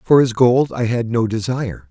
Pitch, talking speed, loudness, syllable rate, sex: 115 Hz, 220 wpm, -17 LUFS, 5.0 syllables/s, male